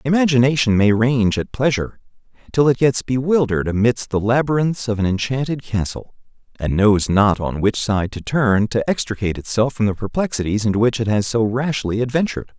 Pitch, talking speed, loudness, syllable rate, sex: 115 Hz, 175 wpm, -18 LUFS, 5.6 syllables/s, male